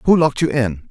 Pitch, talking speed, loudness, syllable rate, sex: 135 Hz, 265 wpm, -17 LUFS, 5.8 syllables/s, male